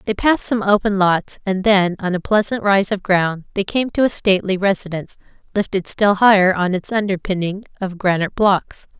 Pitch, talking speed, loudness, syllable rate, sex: 195 Hz, 185 wpm, -18 LUFS, 5.4 syllables/s, female